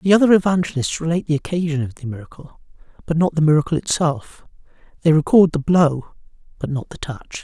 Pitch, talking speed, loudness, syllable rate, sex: 155 Hz, 180 wpm, -18 LUFS, 6.1 syllables/s, male